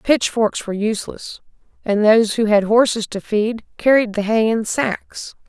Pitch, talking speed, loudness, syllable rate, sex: 220 Hz, 165 wpm, -18 LUFS, 4.6 syllables/s, female